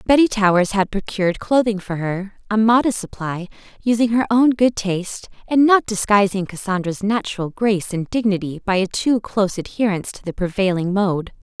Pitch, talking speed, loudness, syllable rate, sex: 205 Hz, 155 wpm, -19 LUFS, 5.4 syllables/s, female